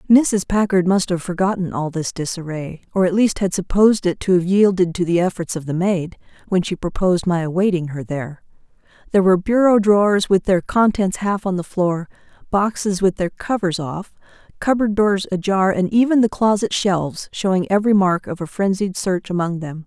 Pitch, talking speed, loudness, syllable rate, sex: 185 Hz, 190 wpm, -19 LUFS, 5.3 syllables/s, female